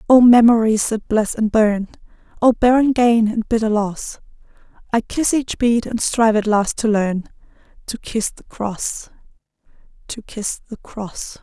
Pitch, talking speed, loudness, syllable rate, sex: 225 Hz, 160 wpm, -17 LUFS, 4.2 syllables/s, female